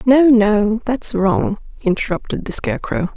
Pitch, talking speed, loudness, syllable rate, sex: 225 Hz, 135 wpm, -17 LUFS, 4.4 syllables/s, female